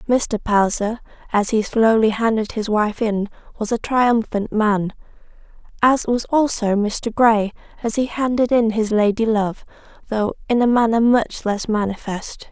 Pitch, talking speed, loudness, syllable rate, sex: 220 Hz, 155 wpm, -19 LUFS, 4.3 syllables/s, female